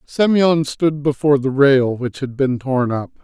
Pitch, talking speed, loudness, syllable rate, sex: 140 Hz, 185 wpm, -17 LUFS, 4.3 syllables/s, male